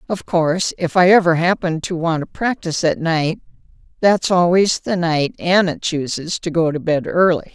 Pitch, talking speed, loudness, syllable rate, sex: 170 Hz, 185 wpm, -17 LUFS, 4.8 syllables/s, female